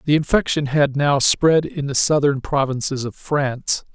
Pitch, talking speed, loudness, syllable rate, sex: 140 Hz, 165 wpm, -19 LUFS, 4.6 syllables/s, male